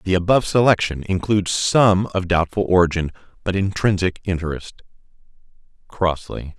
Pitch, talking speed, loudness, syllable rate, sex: 95 Hz, 100 wpm, -19 LUFS, 5.1 syllables/s, male